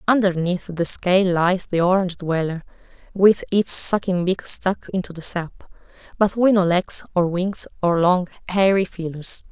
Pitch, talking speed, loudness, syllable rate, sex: 180 Hz, 160 wpm, -20 LUFS, 4.5 syllables/s, female